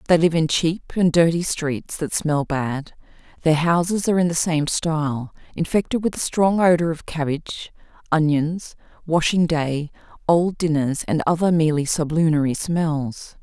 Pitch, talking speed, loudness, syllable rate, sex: 160 Hz, 150 wpm, -21 LUFS, 4.6 syllables/s, female